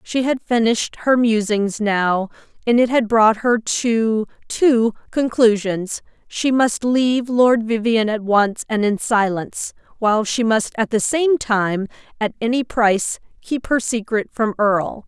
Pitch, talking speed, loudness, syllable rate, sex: 225 Hz, 155 wpm, -18 LUFS, 4.2 syllables/s, female